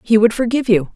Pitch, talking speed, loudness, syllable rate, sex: 225 Hz, 250 wpm, -15 LUFS, 7.2 syllables/s, female